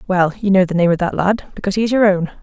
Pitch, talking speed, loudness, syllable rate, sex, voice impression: 190 Hz, 320 wpm, -16 LUFS, 7.1 syllables/s, female, feminine, adult-like, slightly dark, muffled, fluent, slightly intellectual, calm, slightly elegant, modest